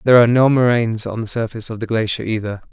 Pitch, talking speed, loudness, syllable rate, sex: 115 Hz, 245 wpm, -17 LUFS, 7.5 syllables/s, male